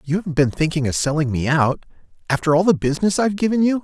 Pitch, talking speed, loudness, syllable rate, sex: 165 Hz, 220 wpm, -19 LUFS, 7.0 syllables/s, male